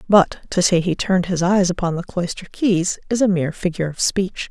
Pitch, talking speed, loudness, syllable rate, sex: 180 Hz, 225 wpm, -19 LUFS, 5.6 syllables/s, female